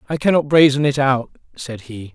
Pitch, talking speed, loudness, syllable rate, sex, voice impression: 130 Hz, 195 wpm, -16 LUFS, 5.3 syllables/s, male, very masculine, very adult-like, slightly old, thick, tensed, very powerful, very bright, very hard, very clear, fluent, slightly raspy, slightly cool, slightly intellectual, slightly sincere, calm, mature, slightly friendly, slightly reassuring, very unique, very wild, lively, very strict, intense